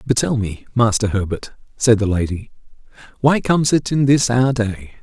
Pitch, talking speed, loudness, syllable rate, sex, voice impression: 115 Hz, 180 wpm, -18 LUFS, 5.0 syllables/s, male, masculine, adult-like, cool, slightly intellectual, slightly calm